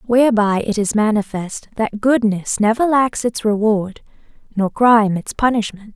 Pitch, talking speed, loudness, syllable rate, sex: 220 Hz, 140 wpm, -17 LUFS, 4.5 syllables/s, female